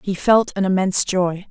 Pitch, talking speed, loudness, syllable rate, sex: 190 Hz, 200 wpm, -18 LUFS, 5.1 syllables/s, female